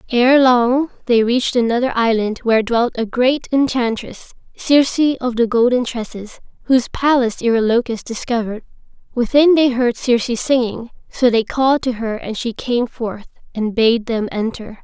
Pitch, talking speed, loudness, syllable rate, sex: 240 Hz, 155 wpm, -17 LUFS, 4.9 syllables/s, female